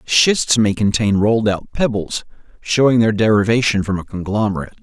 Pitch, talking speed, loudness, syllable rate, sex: 105 Hz, 150 wpm, -16 LUFS, 5.3 syllables/s, male